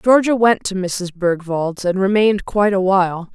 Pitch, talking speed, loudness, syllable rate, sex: 195 Hz, 180 wpm, -17 LUFS, 5.0 syllables/s, female